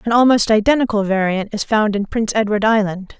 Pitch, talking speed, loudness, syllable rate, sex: 215 Hz, 190 wpm, -16 LUFS, 5.9 syllables/s, female